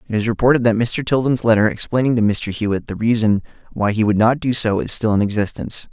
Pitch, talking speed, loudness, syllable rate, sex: 110 Hz, 235 wpm, -18 LUFS, 6.2 syllables/s, male